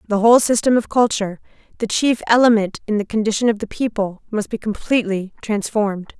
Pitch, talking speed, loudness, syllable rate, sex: 215 Hz, 175 wpm, -18 LUFS, 6.0 syllables/s, female